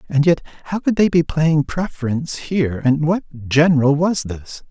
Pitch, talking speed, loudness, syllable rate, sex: 155 Hz, 180 wpm, -18 LUFS, 4.9 syllables/s, male